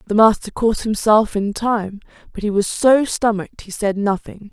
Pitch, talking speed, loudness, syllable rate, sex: 215 Hz, 185 wpm, -18 LUFS, 4.8 syllables/s, female